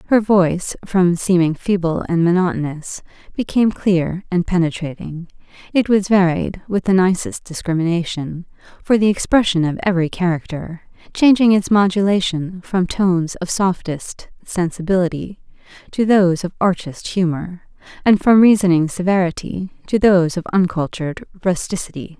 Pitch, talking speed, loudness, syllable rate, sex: 180 Hz, 125 wpm, -17 LUFS, 5.0 syllables/s, female